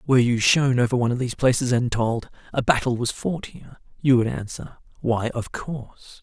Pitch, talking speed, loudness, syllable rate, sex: 125 Hz, 205 wpm, -22 LUFS, 5.8 syllables/s, male